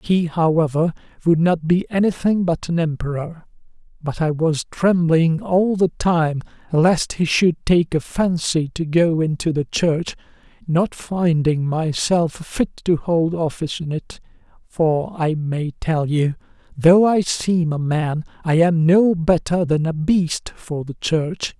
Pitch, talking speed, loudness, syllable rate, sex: 165 Hz, 155 wpm, -19 LUFS, 3.8 syllables/s, male